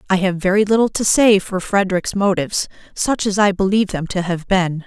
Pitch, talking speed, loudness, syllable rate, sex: 195 Hz, 210 wpm, -17 LUFS, 5.6 syllables/s, female